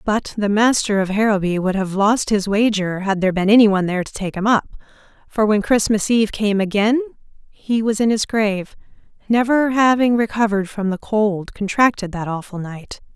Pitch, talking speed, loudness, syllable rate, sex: 210 Hz, 180 wpm, -18 LUFS, 5.3 syllables/s, female